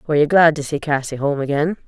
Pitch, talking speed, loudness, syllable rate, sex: 150 Hz, 255 wpm, -18 LUFS, 6.7 syllables/s, female